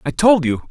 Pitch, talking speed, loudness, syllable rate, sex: 175 Hz, 255 wpm, -15 LUFS, 4.9 syllables/s, male